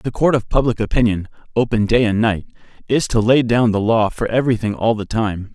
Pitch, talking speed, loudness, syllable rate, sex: 110 Hz, 215 wpm, -18 LUFS, 5.6 syllables/s, male